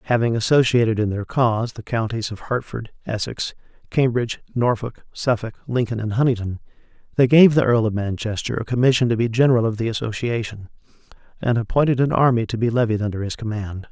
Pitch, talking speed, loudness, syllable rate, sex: 115 Hz, 170 wpm, -20 LUFS, 6.0 syllables/s, male